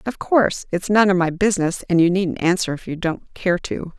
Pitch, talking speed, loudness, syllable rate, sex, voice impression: 180 Hz, 240 wpm, -19 LUFS, 5.3 syllables/s, female, very feminine, very adult-like, middle-aged, thin, slightly tensed, slightly weak, bright, soft, very clear, very fluent, cute, slightly cool, very intellectual, refreshing, sincere, calm, friendly, reassuring, very unique, very elegant, very sweet, lively, kind, slightly intense, sharp, light